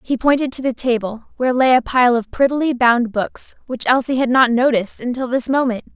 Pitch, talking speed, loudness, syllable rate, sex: 250 Hz, 210 wpm, -17 LUFS, 5.5 syllables/s, female